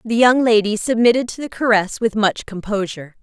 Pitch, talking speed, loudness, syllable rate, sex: 220 Hz, 185 wpm, -17 LUFS, 5.8 syllables/s, female